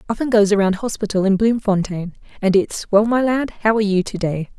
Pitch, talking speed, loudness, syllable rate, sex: 205 Hz, 195 wpm, -18 LUFS, 5.9 syllables/s, female